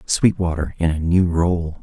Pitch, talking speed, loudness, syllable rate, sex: 85 Hz, 165 wpm, -19 LUFS, 4.2 syllables/s, male